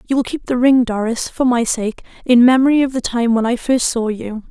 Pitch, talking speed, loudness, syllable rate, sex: 240 Hz, 255 wpm, -16 LUFS, 5.4 syllables/s, female